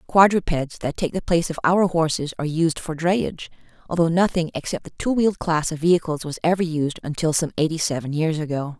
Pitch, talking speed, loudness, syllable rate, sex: 165 Hz, 205 wpm, -22 LUFS, 5.9 syllables/s, female